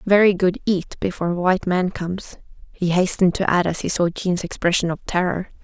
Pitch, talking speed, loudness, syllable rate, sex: 180 Hz, 190 wpm, -20 LUFS, 5.7 syllables/s, female